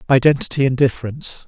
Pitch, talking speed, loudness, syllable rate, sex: 130 Hz, 120 wpm, -17 LUFS, 7.0 syllables/s, male